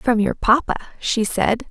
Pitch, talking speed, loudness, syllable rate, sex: 225 Hz, 175 wpm, -20 LUFS, 4.3 syllables/s, female